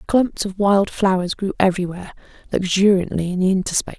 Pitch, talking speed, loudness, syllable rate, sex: 190 Hz, 150 wpm, -19 LUFS, 6.1 syllables/s, female